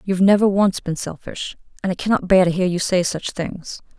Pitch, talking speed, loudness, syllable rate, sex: 185 Hz, 225 wpm, -19 LUFS, 5.5 syllables/s, female